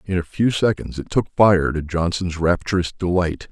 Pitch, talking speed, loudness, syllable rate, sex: 90 Hz, 190 wpm, -20 LUFS, 4.9 syllables/s, male